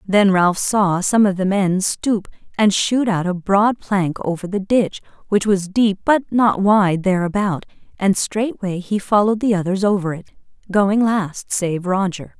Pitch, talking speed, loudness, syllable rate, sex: 195 Hz, 175 wpm, -18 LUFS, 4.1 syllables/s, female